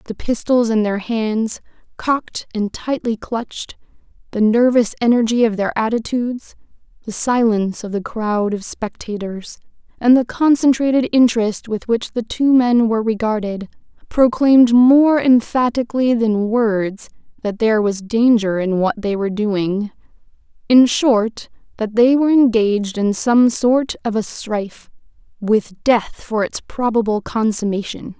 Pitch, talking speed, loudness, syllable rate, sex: 225 Hz, 135 wpm, -17 LUFS, 4.4 syllables/s, female